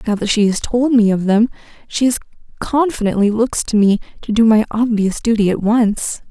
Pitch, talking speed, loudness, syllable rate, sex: 220 Hz, 190 wpm, -16 LUFS, 5.0 syllables/s, female